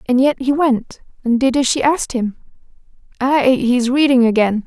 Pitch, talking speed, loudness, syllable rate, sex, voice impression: 255 Hz, 195 wpm, -16 LUFS, 5.2 syllables/s, female, feminine, slightly young, slightly fluent, slightly cute, refreshing, friendly